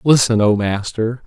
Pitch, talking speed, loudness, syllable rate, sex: 115 Hz, 140 wpm, -16 LUFS, 4.3 syllables/s, male